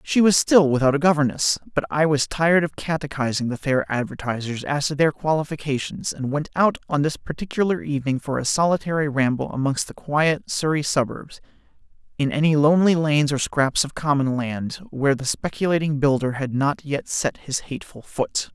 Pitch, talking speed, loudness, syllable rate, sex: 145 Hz, 180 wpm, -22 LUFS, 5.4 syllables/s, male